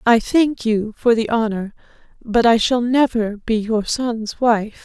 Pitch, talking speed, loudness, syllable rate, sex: 230 Hz, 175 wpm, -18 LUFS, 3.8 syllables/s, female